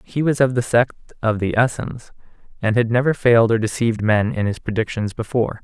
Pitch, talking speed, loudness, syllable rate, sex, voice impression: 115 Hz, 200 wpm, -19 LUFS, 5.6 syllables/s, male, very masculine, very adult-like, thick, relaxed, weak, slightly dark, soft, slightly muffled, fluent, slightly raspy, very cool, very intellectual, slightly refreshing, very sincere, very calm, very mature, friendly, very reassuring, unique, very elegant, slightly wild, very sweet, slightly lively, very kind, very modest